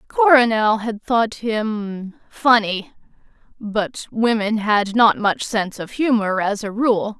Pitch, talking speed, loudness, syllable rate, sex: 220 Hz, 125 wpm, -19 LUFS, 3.5 syllables/s, female